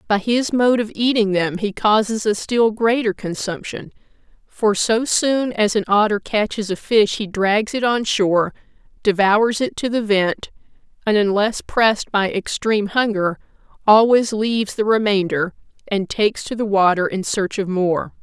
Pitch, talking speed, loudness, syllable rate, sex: 210 Hz, 165 wpm, -18 LUFS, 4.5 syllables/s, female